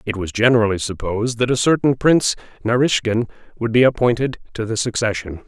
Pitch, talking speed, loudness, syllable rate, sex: 115 Hz, 165 wpm, -18 LUFS, 6.0 syllables/s, male